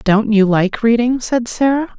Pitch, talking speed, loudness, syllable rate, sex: 230 Hz, 180 wpm, -15 LUFS, 4.1 syllables/s, female